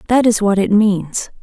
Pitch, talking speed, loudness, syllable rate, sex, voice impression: 205 Hz, 210 wpm, -15 LUFS, 4.3 syllables/s, female, slightly feminine, very gender-neutral, very adult-like, slightly middle-aged, slightly thin, slightly tensed, slightly dark, hard, clear, fluent, very cool, very intellectual, refreshing, sincere, slightly calm, friendly, slightly reassuring, slightly elegant, strict, slightly modest